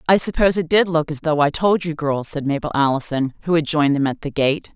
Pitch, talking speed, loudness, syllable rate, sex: 155 Hz, 265 wpm, -19 LUFS, 6.1 syllables/s, female